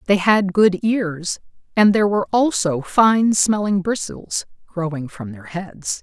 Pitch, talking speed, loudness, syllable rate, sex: 185 Hz, 150 wpm, -18 LUFS, 3.9 syllables/s, female